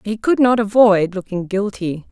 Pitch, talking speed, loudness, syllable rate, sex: 205 Hz, 170 wpm, -17 LUFS, 4.5 syllables/s, female